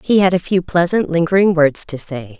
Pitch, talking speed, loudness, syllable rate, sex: 170 Hz, 225 wpm, -15 LUFS, 5.2 syllables/s, female